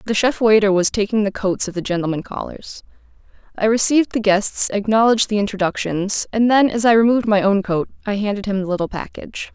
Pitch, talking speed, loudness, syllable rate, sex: 210 Hz, 200 wpm, -18 LUFS, 6.1 syllables/s, female